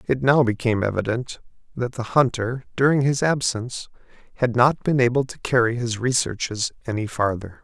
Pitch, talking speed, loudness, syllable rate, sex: 120 Hz, 155 wpm, -22 LUFS, 5.3 syllables/s, male